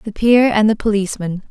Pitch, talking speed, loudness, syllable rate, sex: 210 Hz, 200 wpm, -15 LUFS, 5.9 syllables/s, female